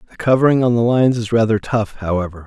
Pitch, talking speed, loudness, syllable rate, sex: 115 Hz, 220 wpm, -16 LUFS, 6.7 syllables/s, male